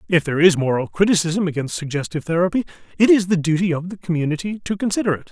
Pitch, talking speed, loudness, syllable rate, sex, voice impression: 175 Hz, 205 wpm, -19 LUFS, 7.2 syllables/s, male, very masculine, very adult-like, slightly old, slightly thick, very tensed, powerful, bright, hard, very clear, fluent, slightly raspy, slightly cool, intellectual, refreshing, very sincere, slightly calm, slightly mature, slightly friendly, reassuring, unique, wild, very lively, intense, slightly sharp